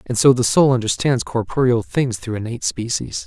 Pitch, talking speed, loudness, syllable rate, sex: 120 Hz, 185 wpm, -18 LUFS, 5.4 syllables/s, male